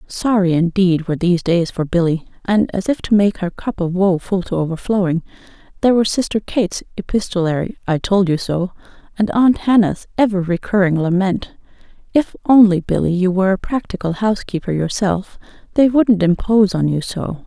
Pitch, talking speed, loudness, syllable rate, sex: 190 Hz, 170 wpm, -17 LUFS, 5.5 syllables/s, female